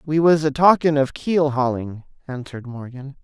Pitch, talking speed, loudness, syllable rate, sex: 140 Hz, 165 wpm, -18 LUFS, 5.0 syllables/s, male